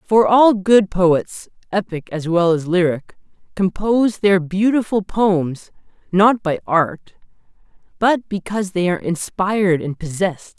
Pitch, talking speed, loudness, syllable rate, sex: 190 Hz, 130 wpm, -17 LUFS, 4.2 syllables/s, male